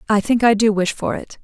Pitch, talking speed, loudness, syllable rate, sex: 215 Hz, 295 wpm, -17 LUFS, 5.6 syllables/s, female